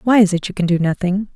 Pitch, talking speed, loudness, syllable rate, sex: 190 Hz, 310 wpm, -17 LUFS, 6.6 syllables/s, female